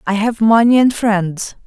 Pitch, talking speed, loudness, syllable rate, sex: 215 Hz, 180 wpm, -14 LUFS, 4.1 syllables/s, female